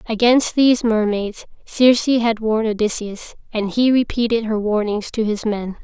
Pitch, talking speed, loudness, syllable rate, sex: 225 Hz, 155 wpm, -18 LUFS, 4.8 syllables/s, female